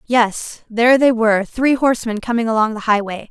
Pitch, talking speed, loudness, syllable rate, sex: 230 Hz, 180 wpm, -16 LUFS, 5.4 syllables/s, female